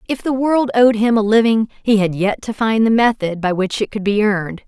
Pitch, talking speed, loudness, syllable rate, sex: 215 Hz, 255 wpm, -16 LUFS, 5.3 syllables/s, female